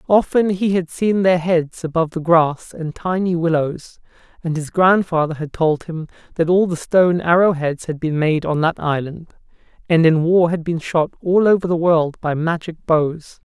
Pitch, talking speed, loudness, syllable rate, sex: 165 Hz, 190 wpm, -18 LUFS, 4.7 syllables/s, male